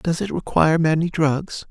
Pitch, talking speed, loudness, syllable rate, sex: 155 Hz, 175 wpm, -20 LUFS, 4.8 syllables/s, male